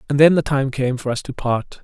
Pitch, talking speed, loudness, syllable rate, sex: 135 Hz, 295 wpm, -19 LUFS, 5.5 syllables/s, male